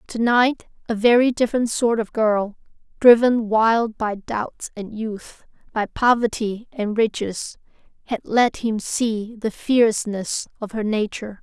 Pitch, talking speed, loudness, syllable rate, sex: 225 Hz, 130 wpm, -20 LUFS, 4.0 syllables/s, female